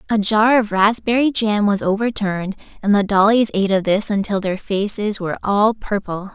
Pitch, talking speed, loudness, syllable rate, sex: 205 Hz, 180 wpm, -18 LUFS, 5.2 syllables/s, female